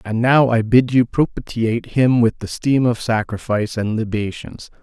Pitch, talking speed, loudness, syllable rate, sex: 115 Hz, 175 wpm, -18 LUFS, 4.7 syllables/s, male